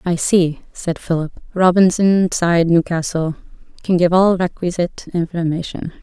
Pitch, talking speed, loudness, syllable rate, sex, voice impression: 175 Hz, 120 wpm, -17 LUFS, 4.5 syllables/s, female, feminine, adult-like, slightly middle-aged, thin, slightly tensed, slightly weak, slightly dark, slightly hard, very clear, fluent, slightly raspy, cool, very intellectual, refreshing, very sincere, calm, slightly friendly, slightly reassuring, slightly unique, elegant, slightly sweet, slightly strict, slightly sharp